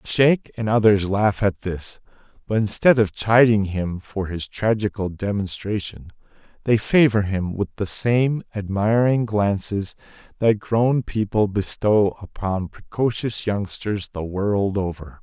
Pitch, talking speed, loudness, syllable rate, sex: 105 Hz, 135 wpm, -21 LUFS, 4.0 syllables/s, male